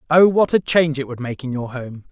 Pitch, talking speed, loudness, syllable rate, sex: 145 Hz, 285 wpm, -19 LUFS, 5.9 syllables/s, male